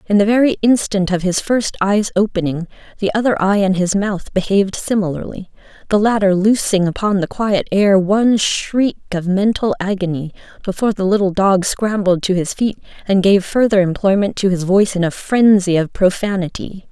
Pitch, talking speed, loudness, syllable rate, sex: 195 Hz, 175 wpm, -16 LUFS, 5.2 syllables/s, female